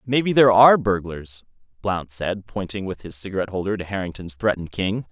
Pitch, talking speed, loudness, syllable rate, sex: 100 Hz, 175 wpm, -21 LUFS, 6.1 syllables/s, male